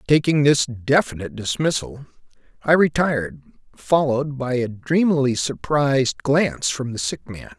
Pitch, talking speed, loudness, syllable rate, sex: 135 Hz, 125 wpm, -20 LUFS, 4.8 syllables/s, male